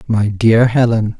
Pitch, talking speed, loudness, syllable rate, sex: 110 Hz, 150 wpm, -13 LUFS, 3.9 syllables/s, male